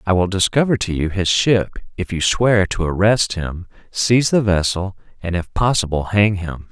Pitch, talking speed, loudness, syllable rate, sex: 95 Hz, 190 wpm, -18 LUFS, 4.8 syllables/s, male